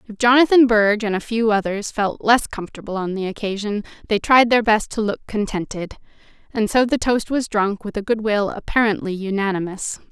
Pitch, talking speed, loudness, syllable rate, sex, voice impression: 215 Hz, 185 wpm, -19 LUFS, 5.4 syllables/s, female, feminine, adult-like, slightly fluent, slightly sincere, slightly calm, friendly